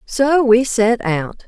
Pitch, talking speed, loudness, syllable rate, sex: 235 Hz, 165 wpm, -15 LUFS, 2.9 syllables/s, female